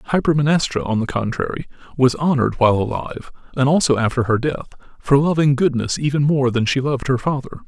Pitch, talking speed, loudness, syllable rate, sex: 135 Hz, 180 wpm, -18 LUFS, 6.4 syllables/s, male